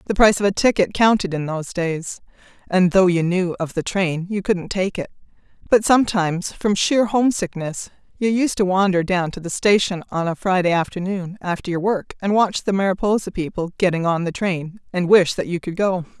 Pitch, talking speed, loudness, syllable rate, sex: 185 Hz, 205 wpm, -20 LUFS, 5.4 syllables/s, female